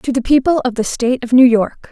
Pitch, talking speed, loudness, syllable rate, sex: 250 Hz, 285 wpm, -14 LUFS, 5.9 syllables/s, female